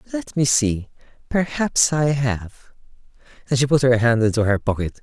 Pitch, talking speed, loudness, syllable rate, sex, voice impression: 125 Hz, 155 wpm, -20 LUFS, 4.7 syllables/s, male, very masculine, very adult-like, middle-aged, very thick, slightly tensed, powerful, bright, hard, slightly muffled, slightly halting, slightly raspy, cool, intellectual, slightly refreshing, sincere, slightly calm, mature, friendly, reassuring, unique, slightly elegant, wild, slightly sweet, lively, kind, slightly intense